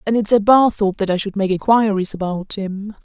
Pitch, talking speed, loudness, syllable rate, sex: 205 Hz, 215 wpm, -17 LUFS, 5.6 syllables/s, female